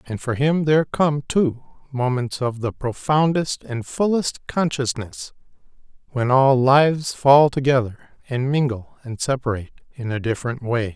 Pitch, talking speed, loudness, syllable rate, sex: 130 Hz, 140 wpm, -20 LUFS, 4.6 syllables/s, male